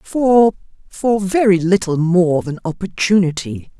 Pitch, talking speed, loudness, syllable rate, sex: 185 Hz, 95 wpm, -16 LUFS, 4.0 syllables/s, female